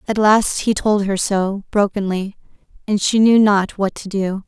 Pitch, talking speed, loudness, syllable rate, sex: 200 Hz, 190 wpm, -17 LUFS, 4.3 syllables/s, female